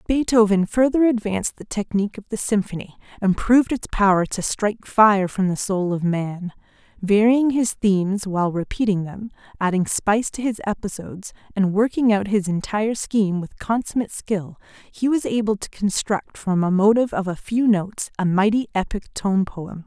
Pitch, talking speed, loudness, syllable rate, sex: 205 Hz, 170 wpm, -21 LUFS, 5.2 syllables/s, female